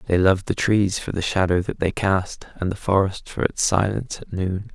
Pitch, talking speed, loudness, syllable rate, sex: 95 Hz, 230 wpm, -22 LUFS, 5.1 syllables/s, male